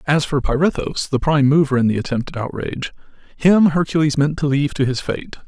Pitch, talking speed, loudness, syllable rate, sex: 145 Hz, 195 wpm, -18 LUFS, 6.0 syllables/s, male